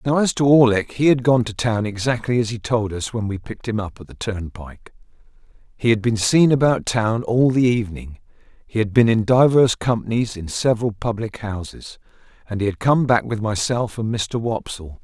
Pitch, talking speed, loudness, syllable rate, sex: 110 Hz, 205 wpm, -19 LUFS, 5.3 syllables/s, male